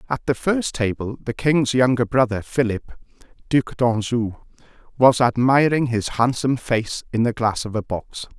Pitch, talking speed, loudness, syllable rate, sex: 120 Hz, 155 wpm, -20 LUFS, 4.5 syllables/s, male